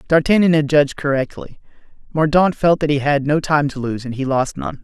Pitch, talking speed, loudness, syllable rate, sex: 150 Hz, 210 wpm, -17 LUFS, 5.6 syllables/s, male